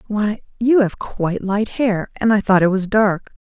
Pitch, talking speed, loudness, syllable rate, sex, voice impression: 205 Hz, 210 wpm, -18 LUFS, 4.4 syllables/s, female, very feminine, adult-like, calm, slightly sweet